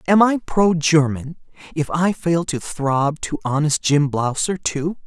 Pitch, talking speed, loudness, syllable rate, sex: 155 Hz, 165 wpm, -19 LUFS, 3.9 syllables/s, male